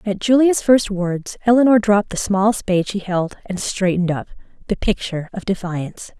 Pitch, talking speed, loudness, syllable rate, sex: 200 Hz, 175 wpm, -18 LUFS, 5.3 syllables/s, female